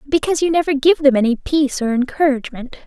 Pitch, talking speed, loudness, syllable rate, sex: 280 Hz, 190 wpm, -16 LUFS, 6.7 syllables/s, female